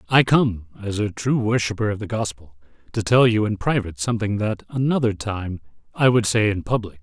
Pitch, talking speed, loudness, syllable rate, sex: 105 Hz, 195 wpm, -21 LUFS, 5.6 syllables/s, male